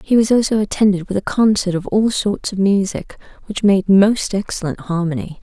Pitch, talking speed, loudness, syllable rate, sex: 200 Hz, 190 wpm, -17 LUFS, 5.2 syllables/s, female